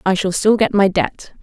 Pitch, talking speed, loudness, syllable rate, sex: 190 Hz, 250 wpm, -16 LUFS, 4.8 syllables/s, female